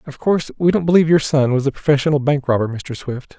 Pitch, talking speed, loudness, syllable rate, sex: 145 Hz, 250 wpm, -17 LUFS, 6.5 syllables/s, male